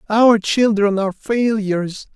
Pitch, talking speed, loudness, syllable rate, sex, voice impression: 210 Hz, 110 wpm, -17 LUFS, 4.2 syllables/s, male, masculine, adult-like, slightly soft, slightly refreshing, sincere, friendly